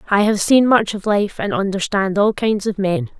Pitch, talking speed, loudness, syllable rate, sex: 205 Hz, 225 wpm, -17 LUFS, 4.8 syllables/s, female